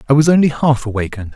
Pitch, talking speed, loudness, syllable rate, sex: 135 Hz, 220 wpm, -15 LUFS, 7.8 syllables/s, male